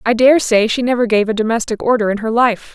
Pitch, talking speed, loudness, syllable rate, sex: 230 Hz, 260 wpm, -15 LUFS, 6.0 syllables/s, female